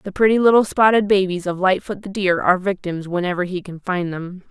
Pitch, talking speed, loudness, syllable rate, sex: 190 Hz, 215 wpm, -19 LUFS, 5.7 syllables/s, female